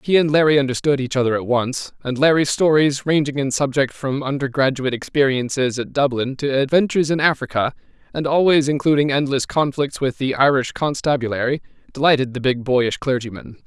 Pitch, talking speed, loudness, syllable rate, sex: 135 Hz, 160 wpm, -19 LUFS, 5.7 syllables/s, male